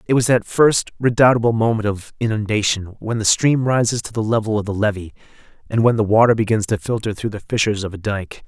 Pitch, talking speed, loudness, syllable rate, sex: 110 Hz, 210 wpm, -18 LUFS, 5.9 syllables/s, male